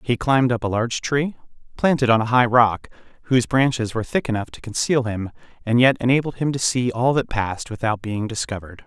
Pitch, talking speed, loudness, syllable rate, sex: 120 Hz, 210 wpm, -20 LUFS, 6.0 syllables/s, male